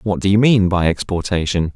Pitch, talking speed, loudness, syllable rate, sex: 95 Hz, 205 wpm, -16 LUFS, 5.5 syllables/s, male